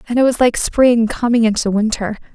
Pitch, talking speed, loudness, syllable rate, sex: 230 Hz, 205 wpm, -15 LUFS, 5.4 syllables/s, female